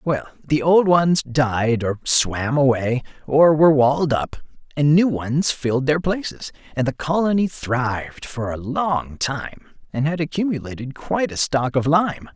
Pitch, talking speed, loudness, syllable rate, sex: 140 Hz, 165 wpm, -20 LUFS, 4.2 syllables/s, male